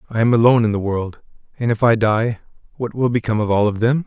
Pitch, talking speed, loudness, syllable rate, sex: 115 Hz, 250 wpm, -18 LUFS, 6.7 syllables/s, male